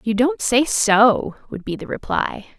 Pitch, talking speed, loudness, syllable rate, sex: 235 Hz, 185 wpm, -19 LUFS, 4.0 syllables/s, female